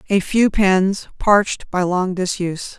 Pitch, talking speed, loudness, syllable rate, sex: 190 Hz, 150 wpm, -18 LUFS, 4.0 syllables/s, female